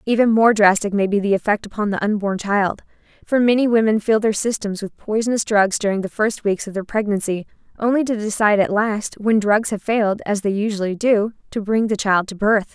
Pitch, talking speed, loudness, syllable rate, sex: 210 Hz, 215 wpm, -19 LUFS, 5.5 syllables/s, female